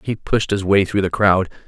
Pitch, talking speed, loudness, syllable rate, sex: 95 Hz, 250 wpm, -18 LUFS, 5.0 syllables/s, male